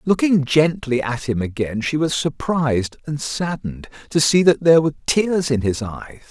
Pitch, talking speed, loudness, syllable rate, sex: 145 Hz, 180 wpm, -19 LUFS, 4.9 syllables/s, male